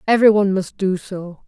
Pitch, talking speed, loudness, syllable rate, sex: 195 Hz, 205 wpm, -17 LUFS, 6.0 syllables/s, female